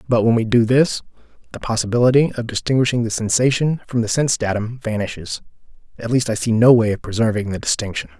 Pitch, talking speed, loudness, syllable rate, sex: 115 Hz, 190 wpm, -18 LUFS, 6.4 syllables/s, male